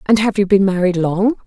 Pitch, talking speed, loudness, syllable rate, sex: 195 Hz, 245 wpm, -15 LUFS, 5.5 syllables/s, female